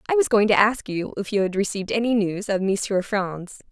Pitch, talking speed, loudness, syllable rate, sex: 205 Hz, 240 wpm, -22 LUFS, 5.6 syllables/s, female